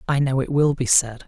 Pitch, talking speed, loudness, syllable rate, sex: 135 Hz, 280 wpm, -19 LUFS, 5.4 syllables/s, male